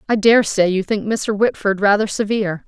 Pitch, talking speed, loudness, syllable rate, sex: 205 Hz, 200 wpm, -17 LUFS, 5.2 syllables/s, female